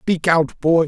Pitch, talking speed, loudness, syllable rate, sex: 165 Hz, 205 wpm, -17 LUFS, 3.4 syllables/s, male